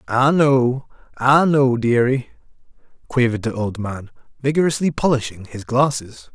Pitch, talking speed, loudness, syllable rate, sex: 125 Hz, 115 wpm, -18 LUFS, 4.6 syllables/s, male